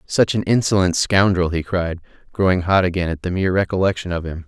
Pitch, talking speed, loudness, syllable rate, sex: 90 Hz, 200 wpm, -19 LUFS, 6.0 syllables/s, male